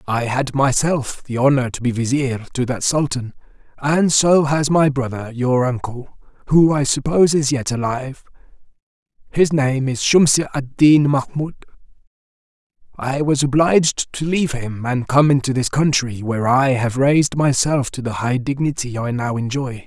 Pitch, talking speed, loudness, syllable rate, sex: 135 Hz, 165 wpm, -18 LUFS, 4.8 syllables/s, male